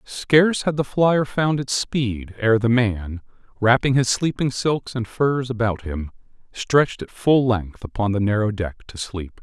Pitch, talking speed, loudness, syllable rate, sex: 120 Hz, 180 wpm, -21 LUFS, 4.2 syllables/s, male